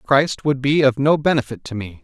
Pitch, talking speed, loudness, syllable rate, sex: 135 Hz, 235 wpm, -18 LUFS, 5.0 syllables/s, male